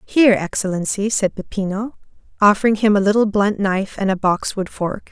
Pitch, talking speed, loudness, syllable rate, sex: 205 Hz, 165 wpm, -18 LUFS, 5.5 syllables/s, female